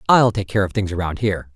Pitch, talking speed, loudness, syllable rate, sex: 100 Hz, 270 wpm, -20 LUFS, 6.6 syllables/s, male